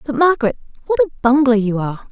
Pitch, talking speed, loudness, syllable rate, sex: 245 Hz, 200 wpm, -16 LUFS, 7.1 syllables/s, female